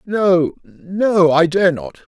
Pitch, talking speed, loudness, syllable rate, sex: 175 Hz, 110 wpm, -15 LUFS, 2.7 syllables/s, male